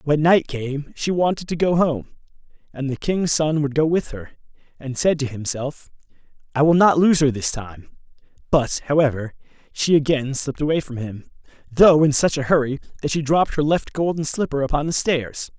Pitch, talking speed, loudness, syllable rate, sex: 145 Hz, 190 wpm, -20 LUFS, 5.1 syllables/s, male